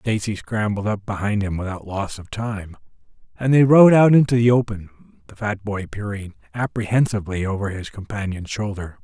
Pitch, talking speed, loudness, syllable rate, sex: 105 Hz, 165 wpm, -20 LUFS, 5.3 syllables/s, male